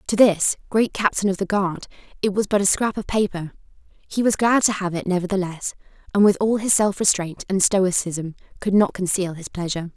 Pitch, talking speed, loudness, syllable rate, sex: 195 Hz, 205 wpm, -21 LUFS, 5.5 syllables/s, female